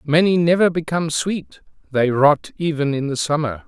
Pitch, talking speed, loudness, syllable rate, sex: 150 Hz, 165 wpm, -19 LUFS, 5.0 syllables/s, male